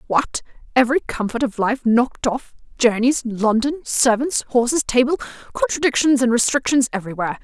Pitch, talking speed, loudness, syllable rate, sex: 250 Hz, 130 wpm, -19 LUFS, 5.6 syllables/s, female